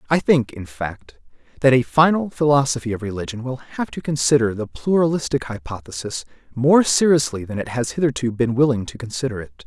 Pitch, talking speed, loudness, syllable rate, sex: 130 Hz, 175 wpm, -20 LUFS, 5.6 syllables/s, male